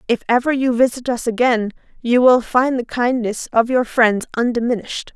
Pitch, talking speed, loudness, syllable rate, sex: 240 Hz, 175 wpm, -17 LUFS, 5.1 syllables/s, female